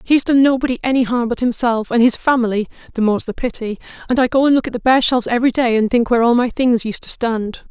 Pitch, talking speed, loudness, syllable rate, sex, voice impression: 240 Hz, 250 wpm, -16 LUFS, 6.6 syllables/s, female, very feminine, middle-aged, very thin, very tensed, slightly powerful, very bright, very hard, very clear, very fluent, slightly raspy, cool, slightly intellectual, very refreshing, slightly sincere, slightly calm, slightly friendly, slightly reassuring, very unique, wild, slightly sweet, very lively, very strict, very intense, very sharp, very light